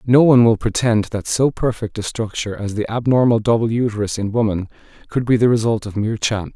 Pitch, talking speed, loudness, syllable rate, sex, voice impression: 110 Hz, 210 wpm, -18 LUFS, 6.1 syllables/s, male, masculine, adult-like, slightly tensed, soft, slightly raspy, cool, intellectual, calm, friendly, wild, kind, slightly modest